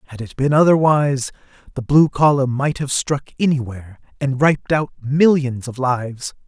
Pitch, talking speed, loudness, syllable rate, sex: 135 Hz, 160 wpm, -17 LUFS, 5.0 syllables/s, male